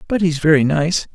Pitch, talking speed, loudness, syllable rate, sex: 160 Hz, 210 wpm, -16 LUFS, 5.4 syllables/s, male